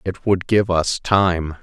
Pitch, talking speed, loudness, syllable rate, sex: 90 Hz, 185 wpm, -18 LUFS, 4.0 syllables/s, male